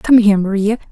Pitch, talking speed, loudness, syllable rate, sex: 210 Hz, 195 wpm, -14 LUFS, 6.5 syllables/s, female